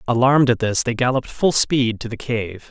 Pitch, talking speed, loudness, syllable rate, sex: 120 Hz, 220 wpm, -19 LUFS, 5.5 syllables/s, male